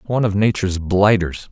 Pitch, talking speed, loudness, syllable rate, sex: 100 Hz, 160 wpm, -17 LUFS, 5.7 syllables/s, male